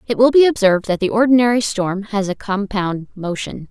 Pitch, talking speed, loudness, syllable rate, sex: 210 Hz, 195 wpm, -17 LUFS, 5.5 syllables/s, female